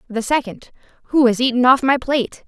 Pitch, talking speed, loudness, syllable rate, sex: 250 Hz, 195 wpm, -17 LUFS, 5.9 syllables/s, female